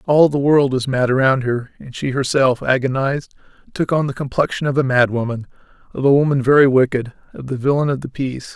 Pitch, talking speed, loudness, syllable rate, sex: 135 Hz, 210 wpm, -17 LUFS, 5.9 syllables/s, male